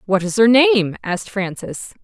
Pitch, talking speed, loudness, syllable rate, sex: 210 Hz, 175 wpm, -16 LUFS, 4.5 syllables/s, female